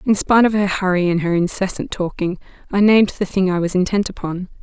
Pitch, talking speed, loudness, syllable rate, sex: 190 Hz, 220 wpm, -18 LUFS, 6.1 syllables/s, female